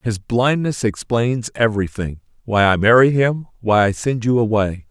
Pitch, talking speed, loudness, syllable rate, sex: 110 Hz, 145 wpm, -18 LUFS, 4.5 syllables/s, male